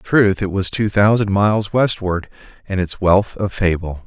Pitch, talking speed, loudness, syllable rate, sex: 95 Hz, 190 wpm, -17 LUFS, 4.7 syllables/s, male